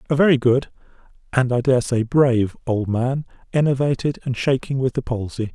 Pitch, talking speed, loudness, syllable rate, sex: 130 Hz, 150 wpm, -20 LUFS, 5.3 syllables/s, male